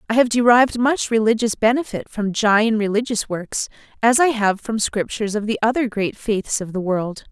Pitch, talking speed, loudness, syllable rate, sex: 220 Hz, 190 wpm, -19 LUFS, 5.1 syllables/s, female